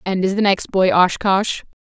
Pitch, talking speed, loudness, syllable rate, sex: 190 Hz, 195 wpm, -17 LUFS, 4.5 syllables/s, female